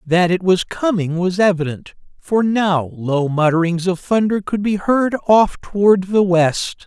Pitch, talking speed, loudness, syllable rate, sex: 185 Hz, 165 wpm, -17 LUFS, 4.1 syllables/s, male